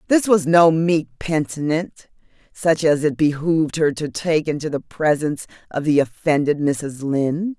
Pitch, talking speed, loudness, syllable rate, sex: 155 Hz, 160 wpm, -19 LUFS, 4.5 syllables/s, female